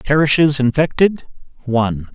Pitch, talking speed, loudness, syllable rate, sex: 135 Hz, 85 wpm, -16 LUFS, 4.7 syllables/s, male